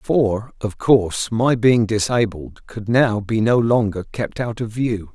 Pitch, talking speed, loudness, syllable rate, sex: 110 Hz, 175 wpm, -19 LUFS, 3.8 syllables/s, male